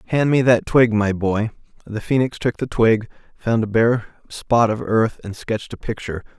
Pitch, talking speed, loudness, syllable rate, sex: 115 Hz, 195 wpm, -19 LUFS, 4.8 syllables/s, male